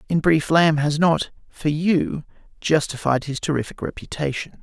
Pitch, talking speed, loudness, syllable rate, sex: 155 Hz, 145 wpm, -21 LUFS, 4.6 syllables/s, male